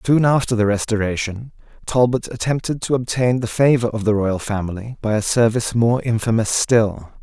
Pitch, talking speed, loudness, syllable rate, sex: 115 Hz, 165 wpm, -19 LUFS, 5.3 syllables/s, male